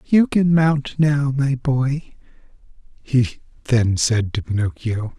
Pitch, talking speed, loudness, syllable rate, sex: 135 Hz, 125 wpm, -19 LUFS, 3.3 syllables/s, male